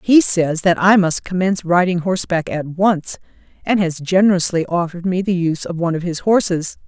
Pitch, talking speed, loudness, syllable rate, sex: 180 Hz, 190 wpm, -17 LUFS, 5.6 syllables/s, female